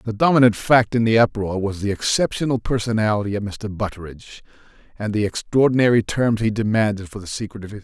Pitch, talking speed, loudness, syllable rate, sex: 110 Hz, 190 wpm, -20 LUFS, 6.6 syllables/s, male